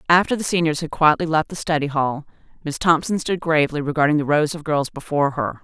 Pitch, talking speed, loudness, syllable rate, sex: 155 Hz, 215 wpm, -20 LUFS, 6.1 syllables/s, female